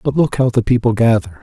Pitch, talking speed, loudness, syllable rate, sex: 115 Hz, 255 wpm, -15 LUFS, 6.0 syllables/s, male